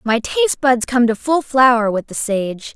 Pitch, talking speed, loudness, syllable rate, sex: 245 Hz, 220 wpm, -16 LUFS, 5.0 syllables/s, female